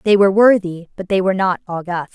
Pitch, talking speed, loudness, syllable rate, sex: 190 Hz, 225 wpm, -16 LUFS, 6.4 syllables/s, female